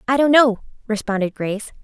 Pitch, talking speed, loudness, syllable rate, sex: 230 Hz, 165 wpm, -18 LUFS, 5.8 syllables/s, female